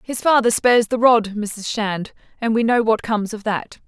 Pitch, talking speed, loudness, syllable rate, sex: 225 Hz, 215 wpm, -19 LUFS, 5.0 syllables/s, female